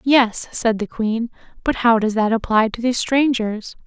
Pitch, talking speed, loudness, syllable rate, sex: 230 Hz, 185 wpm, -19 LUFS, 4.5 syllables/s, female